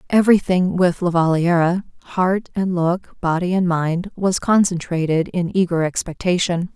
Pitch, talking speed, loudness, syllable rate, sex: 180 Hz, 135 wpm, -19 LUFS, 4.5 syllables/s, female